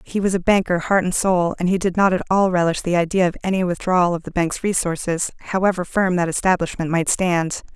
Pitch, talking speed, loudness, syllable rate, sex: 180 Hz, 225 wpm, -19 LUFS, 5.9 syllables/s, female